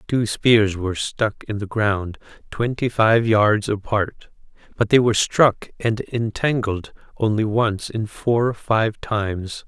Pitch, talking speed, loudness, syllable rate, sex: 110 Hz, 150 wpm, -20 LUFS, 3.8 syllables/s, male